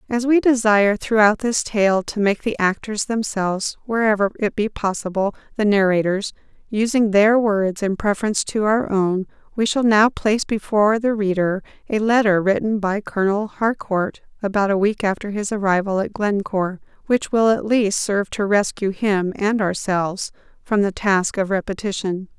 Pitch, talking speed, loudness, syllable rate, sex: 205 Hz, 165 wpm, -19 LUFS, 4.9 syllables/s, female